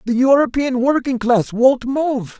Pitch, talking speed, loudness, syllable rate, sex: 250 Hz, 150 wpm, -16 LUFS, 4.0 syllables/s, male